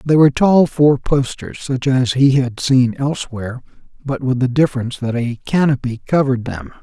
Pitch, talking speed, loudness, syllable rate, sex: 130 Hz, 175 wpm, -16 LUFS, 5.2 syllables/s, male